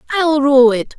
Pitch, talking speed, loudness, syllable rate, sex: 280 Hz, 180 wpm, -12 LUFS, 3.9 syllables/s, female